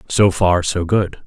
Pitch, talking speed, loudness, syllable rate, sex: 90 Hz, 190 wpm, -17 LUFS, 3.7 syllables/s, male